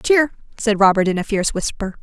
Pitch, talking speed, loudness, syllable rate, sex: 215 Hz, 210 wpm, -18 LUFS, 5.8 syllables/s, female